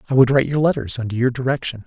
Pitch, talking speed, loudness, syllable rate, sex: 125 Hz, 260 wpm, -19 LUFS, 7.8 syllables/s, male